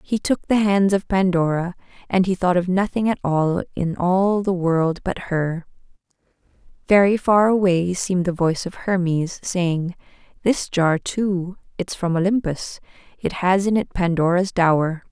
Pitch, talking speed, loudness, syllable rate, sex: 185 Hz, 160 wpm, -20 LUFS, 4.4 syllables/s, female